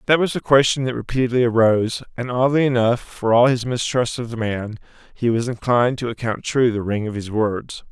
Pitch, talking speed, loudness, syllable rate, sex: 120 Hz, 210 wpm, -20 LUFS, 5.6 syllables/s, male